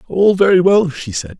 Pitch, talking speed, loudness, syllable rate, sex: 170 Hz, 215 wpm, -14 LUFS, 5.0 syllables/s, male